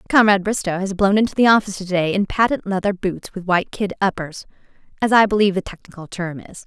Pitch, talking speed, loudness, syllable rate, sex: 195 Hz, 205 wpm, -19 LUFS, 6.5 syllables/s, female